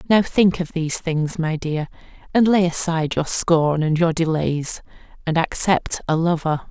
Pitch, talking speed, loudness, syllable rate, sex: 165 Hz, 170 wpm, -20 LUFS, 4.5 syllables/s, female